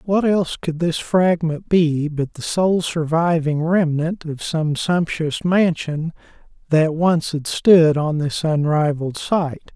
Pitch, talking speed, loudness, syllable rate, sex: 160 Hz, 140 wpm, -19 LUFS, 3.7 syllables/s, male